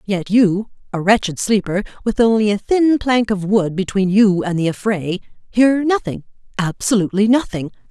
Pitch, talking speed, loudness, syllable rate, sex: 205 Hz, 160 wpm, -17 LUFS, 4.9 syllables/s, female